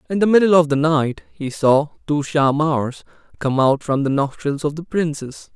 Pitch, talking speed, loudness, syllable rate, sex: 150 Hz, 195 wpm, -18 LUFS, 4.7 syllables/s, male